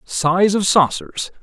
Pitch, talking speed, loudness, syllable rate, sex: 170 Hz, 125 wpm, -16 LUFS, 3.2 syllables/s, male